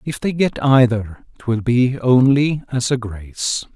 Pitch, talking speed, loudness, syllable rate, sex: 125 Hz, 160 wpm, -17 LUFS, 3.9 syllables/s, male